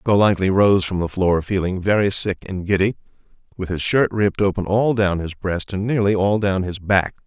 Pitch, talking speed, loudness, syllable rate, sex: 95 Hz, 205 wpm, -19 LUFS, 5.2 syllables/s, male